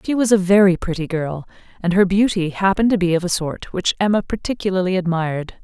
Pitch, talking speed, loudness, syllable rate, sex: 185 Hz, 200 wpm, -18 LUFS, 6.1 syllables/s, female